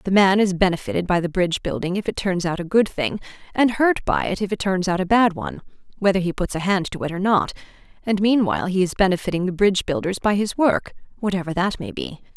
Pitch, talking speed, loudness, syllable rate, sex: 190 Hz, 245 wpm, -21 LUFS, 6.2 syllables/s, female